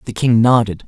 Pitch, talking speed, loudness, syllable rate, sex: 115 Hz, 205 wpm, -14 LUFS, 5.5 syllables/s, male